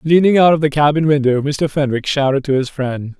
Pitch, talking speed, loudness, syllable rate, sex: 145 Hz, 225 wpm, -15 LUFS, 5.5 syllables/s, male